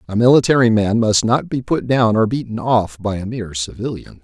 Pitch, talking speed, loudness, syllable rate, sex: 115 Hz, 215 wpm, -17 LUFS, 5.4 syllables/s, male